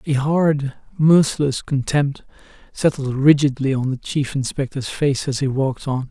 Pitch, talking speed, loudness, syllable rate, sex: 140 Hz, 145 wpm, -19 LUFS, 4.4 syllables/s, male